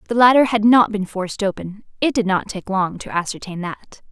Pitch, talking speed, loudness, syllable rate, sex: 205 Hz, 205 wpm, -18 LUFS, 5.4 syllables/s, female